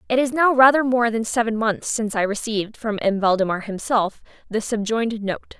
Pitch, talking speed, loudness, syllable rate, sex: 225 Hz, 195 wpm, -21 LUFS, 5.5 syllables/s, female